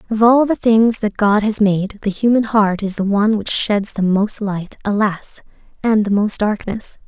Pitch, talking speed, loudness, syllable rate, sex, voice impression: 210 Hz, 205 wpm, -16 LUFS, 4.4 syllables/s, female, feminine, slightly young, clear, fluent, intellectual, calm, elegant, slightly sweet, sharp